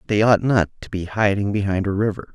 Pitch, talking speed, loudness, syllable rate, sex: 100 Hz, 230 wpm, -20 LUFS, 5.9 syllables/s, male